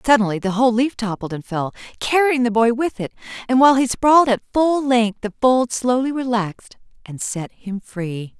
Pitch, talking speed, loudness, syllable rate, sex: 235 Hz, 195 wpm, -19 LUFS, 5.2 syllables/s, female